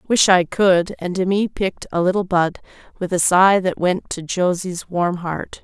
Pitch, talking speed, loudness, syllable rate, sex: 185 Hz, 190 wpm, -18 LUFS, 4.3 syllables/s, female